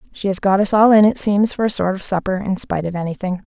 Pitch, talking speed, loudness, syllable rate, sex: 195 Hz, 290 wpm, -17 LUFS, 6.9 syllables/s, female